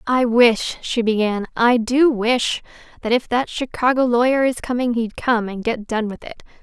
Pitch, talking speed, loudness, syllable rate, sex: 235 Hz, 190 wpm, -19 LUFS, 4.5 syllables/s, female